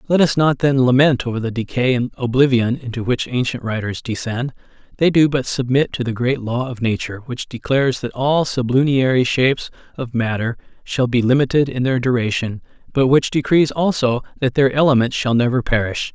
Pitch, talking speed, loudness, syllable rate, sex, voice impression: 125 Hz, 180 wpm, -18 LUFS, 5.4 syllables/s, male, masculine, adult-like, tensed, powerful, slightly bright, clear, fluent, cool, intellectual, sincere, calm, friendly, wild, lively, kind